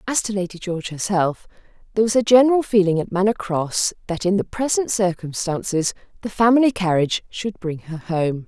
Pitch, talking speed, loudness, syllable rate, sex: 195 Hz, 175 wpm, -20 LUFS, 5.6 syllables/s, female